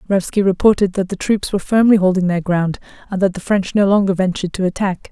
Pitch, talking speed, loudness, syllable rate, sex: 190 Hz, 225 wpm, -16 LUFS, 6.3 syllables/s, female